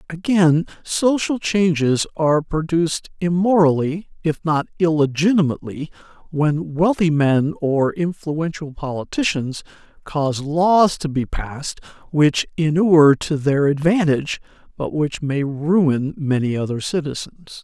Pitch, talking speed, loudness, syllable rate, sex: 155 Hz, 110 wpm, -19 LUFS, 4.2 syllables/s, male